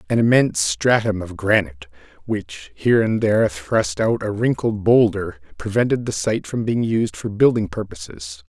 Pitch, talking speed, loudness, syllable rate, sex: 110 Hz, 160 wpm, -19 LUFS, 4.8 syllables/s, male